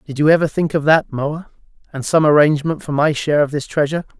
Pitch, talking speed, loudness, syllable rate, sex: 150 Hz, 230 wpm, -16 LUFS, 6.6 syllables/s, male